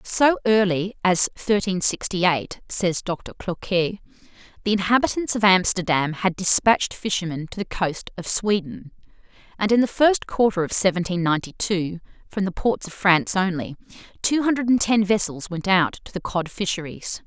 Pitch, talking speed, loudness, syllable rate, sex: 190 Hz, 160 wpm, -21 LUFS, 4.8 syllables/s, female